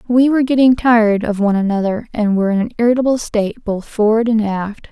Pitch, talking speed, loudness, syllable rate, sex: 220 Hz, 205 wpm, -15 LUFS, 6.4 syllables/s, female